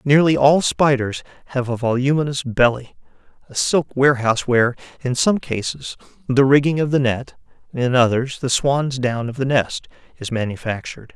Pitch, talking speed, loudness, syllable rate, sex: 130 Hz, 155 wpm, -19 LUFS, 5.1 syllables/s, male